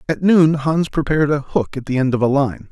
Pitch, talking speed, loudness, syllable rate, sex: 145 Hz, 265 wpm, -17 LUFS, 5.5 syllables/s, male